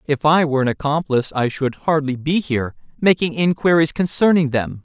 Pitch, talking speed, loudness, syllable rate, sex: 150 Hz, 160 wpm, -18 LUFS, 5.6 syllables/s, male